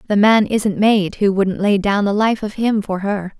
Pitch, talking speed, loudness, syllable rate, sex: 205 Hz, 245 wpm, -16 LUFS, 4.4 syllables/s, female